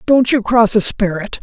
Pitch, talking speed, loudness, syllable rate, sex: 220 Hz, 210 wpm, -14 LUFS, 4.6 syllables/s, female